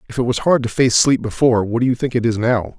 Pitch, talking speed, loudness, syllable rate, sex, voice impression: 120 Hz, 325 wpm, -17 LUFS, 6.6 syllables/s, male, masculine, adult-like, thick, tensed, powerful, slightly hard, slightly muffled, cool, intellectual, calm, slightly mature, wild, lively, slightly kind, slightly modest